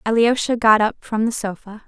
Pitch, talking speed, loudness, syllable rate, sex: 220 Hz, 190 wpm, -18 LUFS, 5.2 syllables/s, female